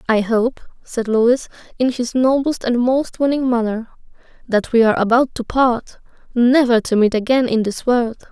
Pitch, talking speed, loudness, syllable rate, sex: 240 Hz, 175 wpm, -17 LUFS, 4.8 syllables/s, female